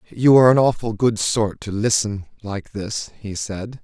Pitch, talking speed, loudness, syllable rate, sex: 110 Hz, 190 wpm, -19 LUFS, 4.4 syllables/s, male